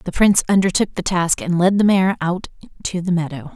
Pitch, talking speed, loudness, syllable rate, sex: 180 Hz, 220 wpm, -18 LUFS, 5.5 syllables/s, female